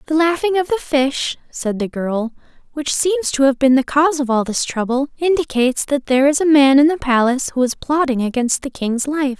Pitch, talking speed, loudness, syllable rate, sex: 275 Hz, 225 wpm, -17 LUFS, 5.4 syllables/s, female